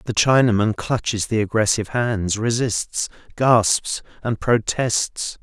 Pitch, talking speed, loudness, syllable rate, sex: 110 Hz, 110 wpm, -20 LUFS, 3.8 syllables/s, male